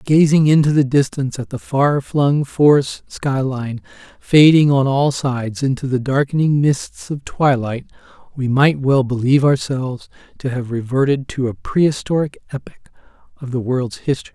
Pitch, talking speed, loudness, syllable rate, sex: 135 Hz, 150 wpm, -17 LUFS, 4.9 syllables/s, male